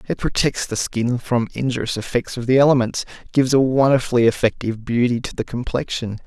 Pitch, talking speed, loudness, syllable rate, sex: 120 Hz, 170 wpm, -20 LUFS, 5.9 syllables/s, male